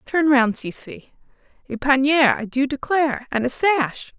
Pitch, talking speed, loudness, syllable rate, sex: 270 Hz, 130 wpm, -20 LUFS, 4.3 syllables/s, female